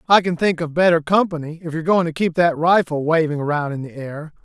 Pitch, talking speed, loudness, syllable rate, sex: 165 Hz, 245 wpm, -19 LUFS, 6.0 syllables/s, male